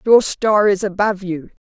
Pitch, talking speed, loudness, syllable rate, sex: 200 Hz, 180 wpm, -17 LUFS, 4.9 syllables/s, female